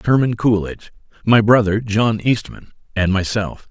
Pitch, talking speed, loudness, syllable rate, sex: 110 Hz, 130 wpm, -17 LUFS, 4.7 syllables/s, male